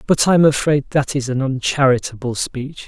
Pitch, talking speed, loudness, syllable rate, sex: 135 Hz, 165 wpm, -17 LUFS, 4.8 syllables/s, male